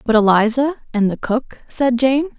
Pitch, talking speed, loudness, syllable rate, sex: 245 Hz, 175 wpm, -17 LUFS, 4.6 syllables/s, female